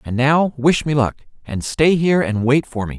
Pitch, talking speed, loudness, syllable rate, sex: 135 Hz, 240 wpm, -17 LUFS, 4.8 syllables/s, male